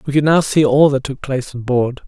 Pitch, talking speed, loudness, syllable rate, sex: 135 Hz, 290 wpm, -16 LUFS, 5.7 syllables/s, male